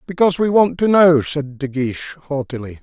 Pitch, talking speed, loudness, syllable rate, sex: 150 Hz, 190 wpm, -17 LUFS, 5.2 syllables/s, male